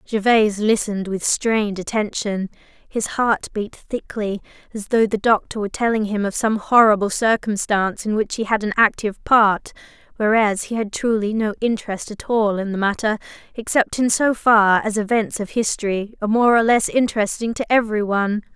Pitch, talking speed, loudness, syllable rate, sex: 215 Hz, 170 wpm, -19 LUFS, 5.3 syllables/s, female